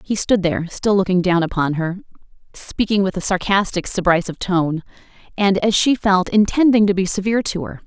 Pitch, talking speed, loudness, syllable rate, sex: 190 Hz, 185 wpm, -18 LUFS, 5.6 syllables/s, female